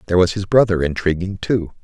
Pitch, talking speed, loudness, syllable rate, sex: 95 Hz, 195 wpm, -18 LUFS, 6.3 syllables/s, male